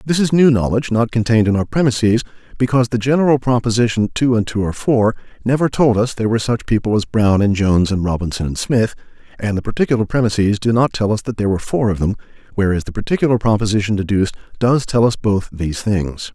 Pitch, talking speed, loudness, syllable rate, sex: 110 Hz, 215 wpm, -17 LUFS, 6.7 syllables/s, male